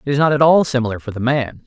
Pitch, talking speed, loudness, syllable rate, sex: 130 Hz, 325 wpm, -16 LUFS, 7.1 syllables/s, male